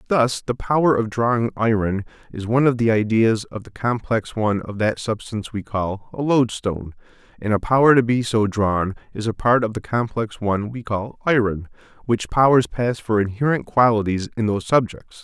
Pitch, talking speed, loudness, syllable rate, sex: 110 Hz, 190 wpm, -20 LUFS, 5.2 syllables/s, male